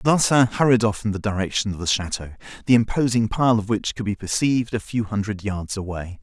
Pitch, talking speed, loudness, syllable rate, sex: 110 Hz, 210 wpm, -22 LUFS, 5.7 syllables/s, male